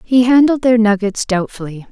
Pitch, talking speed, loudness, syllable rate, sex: 225 Hz, 155 wpm, -13 LUFS, 5.0 syllables/s, female